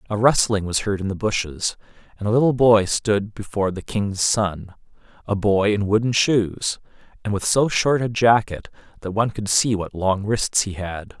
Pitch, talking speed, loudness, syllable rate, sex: 105 Hz, 195 wpm, -20 LUFS, 4.7 syllables/s, male